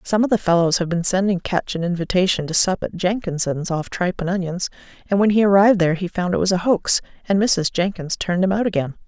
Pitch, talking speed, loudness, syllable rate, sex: 185 Hz, 240 wpm, -19 LUFS, 6.1 syllables/s, female